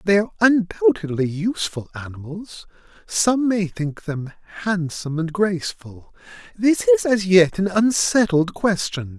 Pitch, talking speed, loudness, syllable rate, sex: 185 Hz, 125 wpm, -20 LUFS, 4.5 syllables/s, male